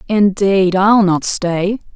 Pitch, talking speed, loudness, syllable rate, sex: 195 Hz, 125 wpm, -14 LUFS, 3.0 syllables/s, female